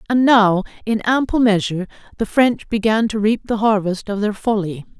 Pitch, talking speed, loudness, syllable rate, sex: 215 Hz, 180 wpm, -18 LUFS, 5.2 syllables/s, female